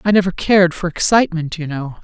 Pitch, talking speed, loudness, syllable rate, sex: 175 Hz, 205 wpm, -16 LUFS, 6.3 syllables/s, female